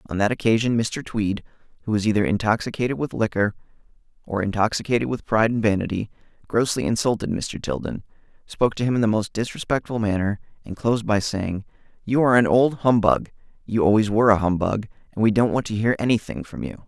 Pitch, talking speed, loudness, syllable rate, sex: 110 Hz, 185 wpm, -22 LUFS, 6.2 syllables/s, male